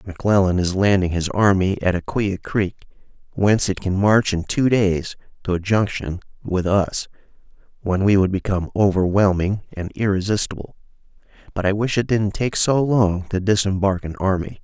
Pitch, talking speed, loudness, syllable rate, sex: 100 Hz, 160 wpm, -20 LUFS, 5.0 syllables/s, male